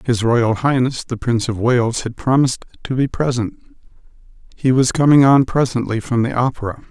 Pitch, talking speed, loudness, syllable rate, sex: 125 Hz, 175 wpm, -17 LUFS, 5.2 syllables/s, male